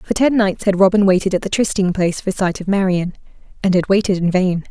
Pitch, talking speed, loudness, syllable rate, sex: 190 Hz, 240 wpm, -17 LUFS, 6.2 syllables/s, female